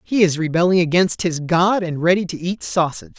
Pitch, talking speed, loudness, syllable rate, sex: 175 Hz, 205 wpm, -18 LUFS, 5.5 syllables/s, male